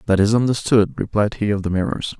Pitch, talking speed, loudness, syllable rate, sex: 105 Hz, 220 wpm, -19 LUFS, 6.0 syllables/s, male